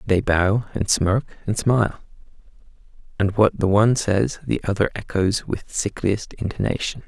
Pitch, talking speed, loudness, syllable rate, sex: 100 Hz, 145 wpm, -21 LUFS, 4.7 syllables/s, male